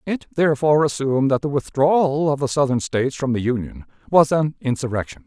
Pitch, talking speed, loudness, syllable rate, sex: 140 Hz, 180 wpm, -20 LUFS, 6.1 syllables/s, male